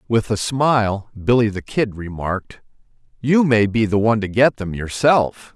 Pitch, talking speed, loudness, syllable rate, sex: 110 Hz, 175 wpm, -18 LUFS, 4.6 syllables/s, male